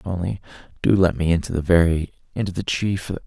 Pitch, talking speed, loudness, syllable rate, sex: 90 Hz, 185 wpm, -21 LUFS, 5.9 syllables/s, male